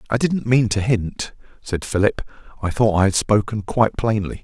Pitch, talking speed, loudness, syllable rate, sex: 110 Hz, 205 wpm, -20 LUFS, 5.4 syllables/s, male